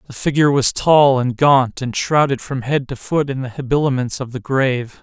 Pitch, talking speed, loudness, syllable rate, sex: 135 Hz, 215 wpm, -17 LUFS, 5.1 syllables/s, male